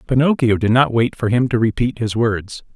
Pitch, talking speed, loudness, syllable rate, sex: 120 Hz, 220 wpm, -17 LUFS, 5.1 syllables/s, male